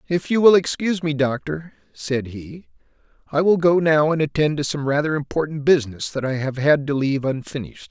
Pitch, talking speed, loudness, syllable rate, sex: 145 Hz, 195 wpm, -20 LUFS, 5.6 syllables/s, male